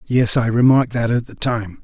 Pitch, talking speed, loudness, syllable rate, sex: 120 Hz, 230 wpm, -17 LUFS, 5.3 syllables/s, male